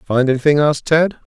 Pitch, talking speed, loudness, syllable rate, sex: 145 Hz, 175 wpm, -15 LUFS, 6.3 syllables/s, male